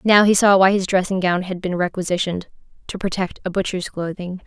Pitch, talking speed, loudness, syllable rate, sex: 185 Hz, 190 wpm, -19 LUFS, 5.8 syllables/s, female